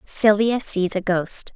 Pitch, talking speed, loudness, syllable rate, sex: 200 Hz, 155 wpm, -20 LUFS, 3.5 syllables/s, female